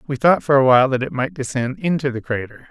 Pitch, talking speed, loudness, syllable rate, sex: 135 Hz, 265 wpm, -18 LUFS, 6.3 syllables/s, male